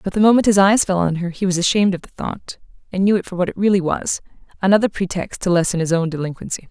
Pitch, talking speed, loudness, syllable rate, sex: 185 Hz, 260 wpm, -18 LUFS, 6.8 syllables/s, female